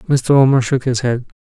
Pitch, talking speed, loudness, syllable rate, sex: 130 Hz, 210 wpm, -15 LUFS, 4.8 syllables/s, male